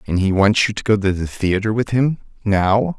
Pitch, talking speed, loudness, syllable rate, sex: 105 Hz, 220 wpm, -18 LUFS, 5.0 syllables/s, male